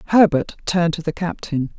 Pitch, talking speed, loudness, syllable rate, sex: 170 Hz, 170 wpm, -20 LUFS, 5.6 syllables/s, female